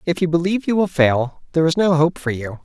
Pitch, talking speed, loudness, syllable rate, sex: 165 Hz, 275 wpm, -18 LUFS, 6.2 syllables/s, male